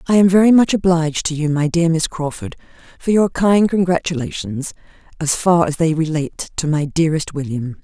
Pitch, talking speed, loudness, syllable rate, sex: 160 Hz, 185 wpm, -17 LUFS, 5.5 syllables/s, female